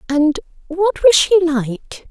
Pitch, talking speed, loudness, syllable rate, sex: 320 Hz, 140 wpm, -15 LUFS, 3.3 syllables/s, female